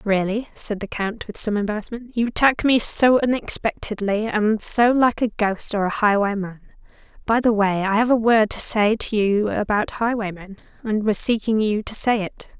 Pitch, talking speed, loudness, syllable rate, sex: 215 Hz, 185 wpm, -20 LUFS, 4.8 syllables/s, female